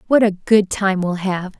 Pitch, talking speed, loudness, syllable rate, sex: 195 Hz, 225 wpm, -18 LUFS, 4.4 syllables/s, female